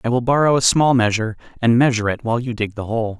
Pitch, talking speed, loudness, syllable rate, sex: 120 Hz, 265 wpm, -18 LUFS, 7.0 syllables/s, male